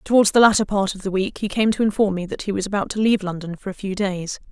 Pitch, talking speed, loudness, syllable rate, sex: 200 Hz, 305 wpm, -21 LUFS, 6.7 syllables/s, female